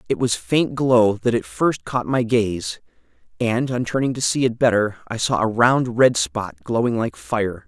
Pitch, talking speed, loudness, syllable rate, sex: 120 Hz, 205 wpm, -20 LUFS, 4.3 syllables/s, male